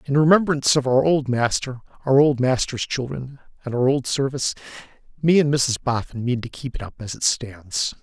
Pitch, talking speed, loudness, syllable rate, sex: 130 Hz, 195 wpm, -21 LUFS, 5.2 syllables/s, male